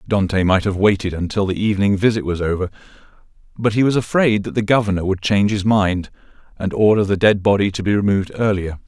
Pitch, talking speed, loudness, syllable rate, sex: 100 Hz, 205 wpm, -18 LUFS, 6.3 syllables/s, male